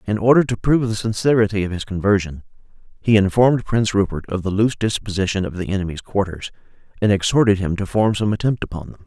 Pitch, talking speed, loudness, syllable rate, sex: 105 Hz, 200 wpm, -19 LUFS, 6.6 syllables/s, male